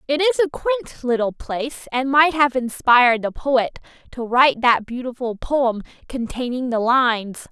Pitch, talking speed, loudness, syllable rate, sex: 255 Hz, 160 wpm, -19 LUFS, 4.6 syllables/s, female